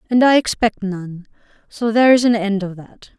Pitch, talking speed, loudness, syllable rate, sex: 215 Hz, 205 wpm, -16 LUFS, 5.1 syllables/s, female